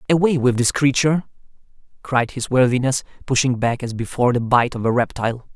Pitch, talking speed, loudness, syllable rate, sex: 125 Hz, 175 wpm, -19 LUFS, 6.0 syllables/s, male